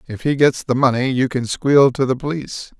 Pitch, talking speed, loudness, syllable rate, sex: 135 Hz, 235 wpm, -17 LUFS, 5.3 syllables/s, male